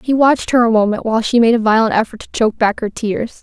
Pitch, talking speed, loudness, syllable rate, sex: 225 Hz, 280 wpm, -15 LUFS, 6.7 syllables/s, female